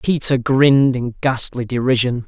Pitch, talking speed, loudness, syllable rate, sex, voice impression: 130 Hz, 130 wpm, -17 LUFS, 4.6 syllables/s, male, masculine, adult-like, slightly relaxed, slightly powerful, slightly hard, muffled, raspy, intellectual, slightly friendly, slightly wild, lively, strict, sharp